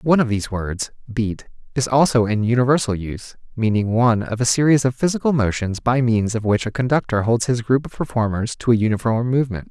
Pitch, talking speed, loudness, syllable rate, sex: 120 Hz, 205 wpm, -19 LUFS, 6.0 syllables/s, male